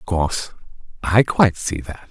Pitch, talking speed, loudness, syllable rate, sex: 90 Hz, 170 wpm, -19 LUFS, 5.0 syllables/s, male